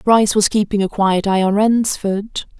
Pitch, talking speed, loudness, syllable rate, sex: 205 Hz, 185 wpm, -16 LUFS, 4.6 syllables/s, female